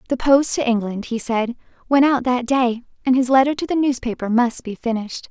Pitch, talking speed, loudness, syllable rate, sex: 250 Hz, 215 wpm, -19 LUFS, 5.5 syllables/s, female